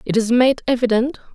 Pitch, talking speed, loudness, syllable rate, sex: 240 Hz, 180 wpm, -17 LUFS, 5.8 syllables/s, female